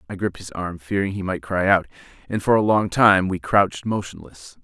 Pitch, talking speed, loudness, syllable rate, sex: 95 Hz, 220 wpm, -21 LUFS, 5.5 syllables/s, male